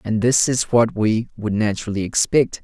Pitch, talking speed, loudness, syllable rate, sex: 110 Hz, 180 wpm, -19 LUFS, 4.9 syllables/s, male